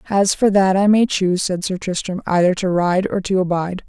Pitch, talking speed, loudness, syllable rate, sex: 185 Hz, 230 wpm, -17 LUFS, 5.5 syllables/s, female